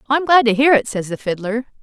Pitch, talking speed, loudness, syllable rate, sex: 245 Hz, 295 wpm, -16 LUFS, 6.5 syllables/s, female